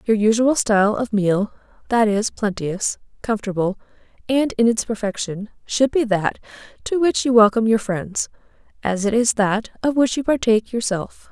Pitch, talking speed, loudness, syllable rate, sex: 220 Hz, 155 wpm, -20 LUFS, 4.9 syllables/s, female